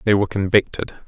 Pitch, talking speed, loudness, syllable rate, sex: 100 Hz, 165 wpm, -18 LUFS, 6.4 syllables/s, male